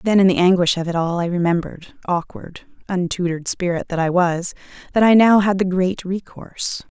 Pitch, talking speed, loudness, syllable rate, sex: 180 Hz, 190 wpm, -19 LUFS, 5.5 syllables/s, female